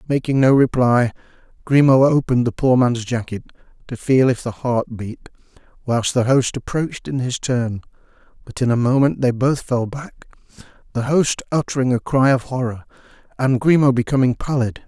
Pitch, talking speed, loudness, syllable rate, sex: 125 Hz, 165 wpm, -18 LUFS, 5.1 syllables/s, male